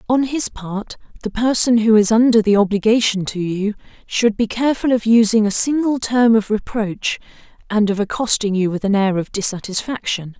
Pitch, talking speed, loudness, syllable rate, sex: 215 Hz, 180 wpm, -17 LUFS, 5.1 syllables/s, female